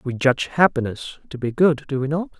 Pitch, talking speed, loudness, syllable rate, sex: 140 Hz, 225 wpm, -21 LUFS, 5.7 syllables/s, male